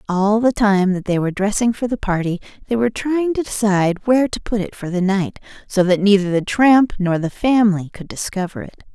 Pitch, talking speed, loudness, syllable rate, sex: 205 Hz, 220 wpm, -18 LUFS, 5.7 syllables/s, female